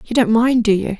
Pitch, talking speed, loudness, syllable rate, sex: 220 Hz, 300 wpm, -15 LUFS, 5.6 syllables/s, female